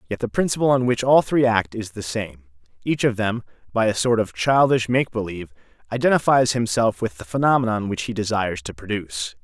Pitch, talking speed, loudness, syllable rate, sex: 110 Hz, 195 wpm, -21 LUFS, 5.8 syllables/s, male